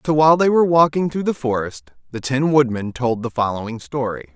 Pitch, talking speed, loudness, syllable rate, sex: 130 Hz, 205 wpm, -19 LUFS, 5.8 syllables/s, male